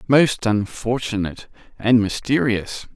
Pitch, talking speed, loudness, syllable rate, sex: 115 Hz, 60 wpm, -20 LUFS, 4.1 syllables/s, male